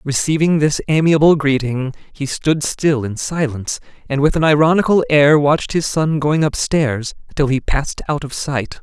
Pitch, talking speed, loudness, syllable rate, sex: 145 Hz, 170 wpm, -16 LUFS, 4.8 syllables/s, male